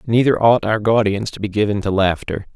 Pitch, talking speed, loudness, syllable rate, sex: 110 Hz, 210 wpm, -17 LUFS, 5.5 syllables/s, male